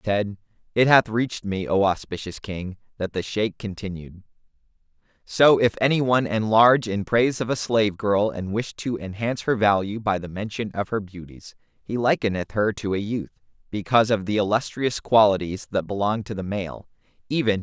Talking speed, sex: 195 wpm, male